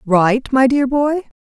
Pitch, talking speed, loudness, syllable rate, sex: 255 Hz, 165 wpm, -16 LUFS, 3.4 syllables/s, female